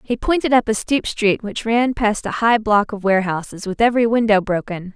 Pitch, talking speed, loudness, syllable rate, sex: 220 Hz, 220 wpm, -18 LUFS, 5.4 syllables/s, female